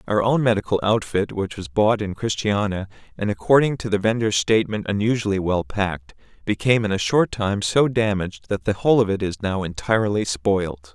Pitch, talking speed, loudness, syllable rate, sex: 105 Hz, 185 wpm, -21 LUFS, 5.5 syllables/s, male